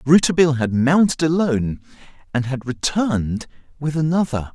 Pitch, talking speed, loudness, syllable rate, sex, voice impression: 145 Hz, 120 wpm, -19 LUFS, 5.6 syllables/s, male, masculine, middle-aged, tensed, powerful, clear, fluent, cool, intellectual, mature, slightly friendly, wild, lively, slightly intense